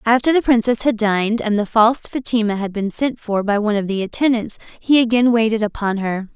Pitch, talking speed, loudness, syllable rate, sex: 220 Hz, 215 wpm, -18 LUFS, 5.7 syllables/s, female